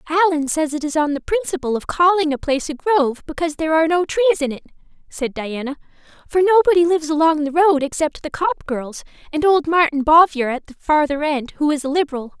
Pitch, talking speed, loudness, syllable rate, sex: 310 Hz, 215 wpm, -18 LUFS, 6.2 syllables/s, female